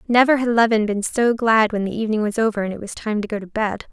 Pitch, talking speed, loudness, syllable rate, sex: 215 Hz, 290 wpm, -19 LUFS, 6.5 syllables/s, female